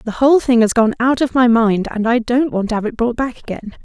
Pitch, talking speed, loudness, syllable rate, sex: 235 Hz, 295 wpm, -15 LUFS, 5.9 syllables/s, female